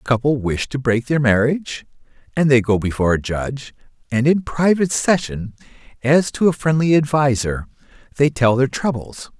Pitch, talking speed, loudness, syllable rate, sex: 130 Hz, 165 wpm, -18 LUFS, 5.2 syllables/s, male